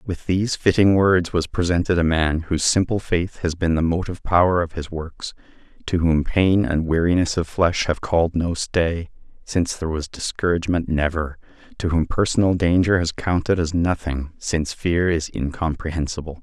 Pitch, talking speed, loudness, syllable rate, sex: 85 Hz, 170 wpm, -21 LUFS, 5.1 syllables/s, male